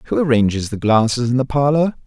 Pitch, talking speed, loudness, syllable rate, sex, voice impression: 125 Hz, 205 wpm, -17 LUFS, 6.2 syllables/s, male, very masculine, slightly old, very thick, slightly tensed, very powerful, bright, soft, muffled, slightly halting, raspy, cool, intellectual, slightly refreshing, sincere, calm, very mature, friendly, slightly reassuring, very unique, slightly elegant, wild, sweet, lively, kind, slightly modest